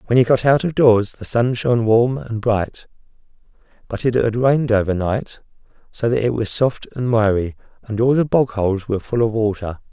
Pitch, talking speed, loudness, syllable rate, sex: 115 Hz, 200 wpm, -18 LUFS, 5.2 syllables/s, male